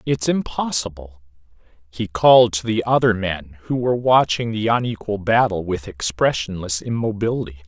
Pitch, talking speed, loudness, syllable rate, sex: 105 Hz, 135 wpm, -19 LUFS, 5.1 syllables/s, male